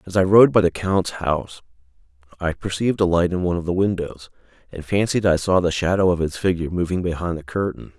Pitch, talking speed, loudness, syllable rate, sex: 90 Hz, 220 wpm, -20 LUFS, 6.2 syllables/s, male